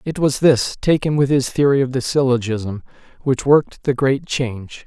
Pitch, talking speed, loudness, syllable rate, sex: 135 Hz, 185 wpm, -18 LUFS, 4.8 syllables/s, male